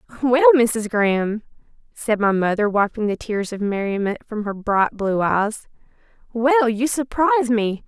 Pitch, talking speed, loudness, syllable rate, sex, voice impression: 220 Hz, 145 wpm, -20 LUFS, 4.5 syllables/s, female, feminine, slightly adult-like, slightly soft, cute, friendly, slightly sweet, kind